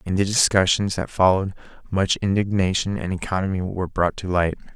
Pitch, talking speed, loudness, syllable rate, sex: 95 Hz, 165 wpm, -21 LUFS, 5.8 syllables/s, male